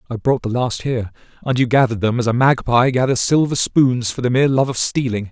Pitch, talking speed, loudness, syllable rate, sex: 125 Hz, 225 wpm, -17 LUFS, 6.1 syllables/s, male